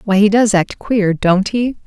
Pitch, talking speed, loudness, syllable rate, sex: 205 Hz, 225 wpm, -14 LUFS, 4.2 syllables/s, female